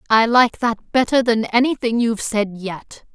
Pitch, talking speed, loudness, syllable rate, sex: 230 Hz, 170 wpm, -18 LUFS, 4.5 syllables/s, female